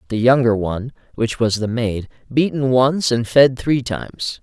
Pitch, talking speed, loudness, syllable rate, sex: 120 Hz, 175 wpm, -18 LUFS, 4.5 syllables/s, male